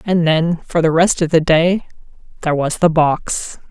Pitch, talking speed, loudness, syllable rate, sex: 165 Hz, 195 wpm, -16 LUFS, 4.4 syllables/s, female